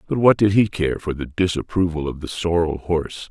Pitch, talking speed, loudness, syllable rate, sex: 85 Hz, 220 wpm, -20 LUFS, 5.4 syllables/s, male